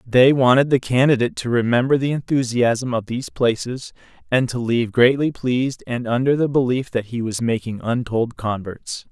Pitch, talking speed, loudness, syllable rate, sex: 125 Hz, 170 wpm, -19 LUFS, 5.2 syllables/s, male